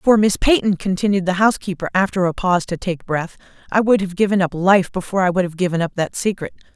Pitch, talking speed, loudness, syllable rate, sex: 190 Hz, 230 wpm, -18 LUFS, 6.3 syllables/s, female